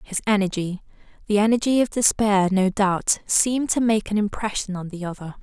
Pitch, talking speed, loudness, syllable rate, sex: 205 Hz, 165 wpm, -21 LUFS, 5.3 syllables/s, female